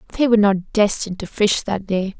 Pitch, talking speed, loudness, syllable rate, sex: 205 Hz, 220 wpm, -19 LUFS, 6.1 syllables/s, female